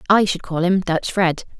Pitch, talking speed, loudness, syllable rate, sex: 180 Hz, 225 wpm, -19 LUFS, 4.9 syllables/s, female